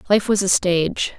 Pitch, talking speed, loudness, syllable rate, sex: 195 Hz, 205 wpm, -18 LUFS, 5.3 syllables/s, female